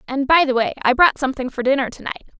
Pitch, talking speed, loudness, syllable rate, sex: 270 Hz, 250 wpm, -18 LUFS, 7.3 syllables/s, female